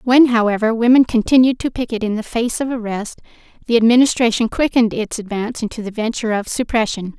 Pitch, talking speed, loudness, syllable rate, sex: 230 Hz, 175 wpm, -17 LUFS, 6.1 syllables/s, female